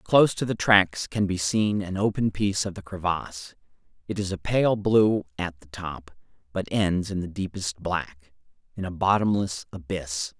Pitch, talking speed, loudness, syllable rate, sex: 95 Hz, 180 wpm, -25 LUFS, 4.6 syllables/s, male